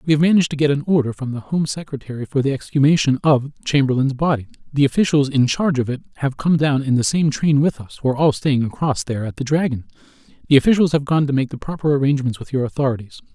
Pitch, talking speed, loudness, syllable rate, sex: 140 Hz, 235 wpm, -19 LUFS, 6.9 syllables/s, male